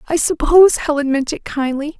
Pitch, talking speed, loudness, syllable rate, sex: 300 Hz, 180 wpm, -15 LUFS, 5.4 syllables/s, female